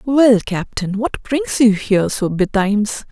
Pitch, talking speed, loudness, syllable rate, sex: 220 Hz, 155 wpm, -16 LUFS, 4.1 syllables/s, female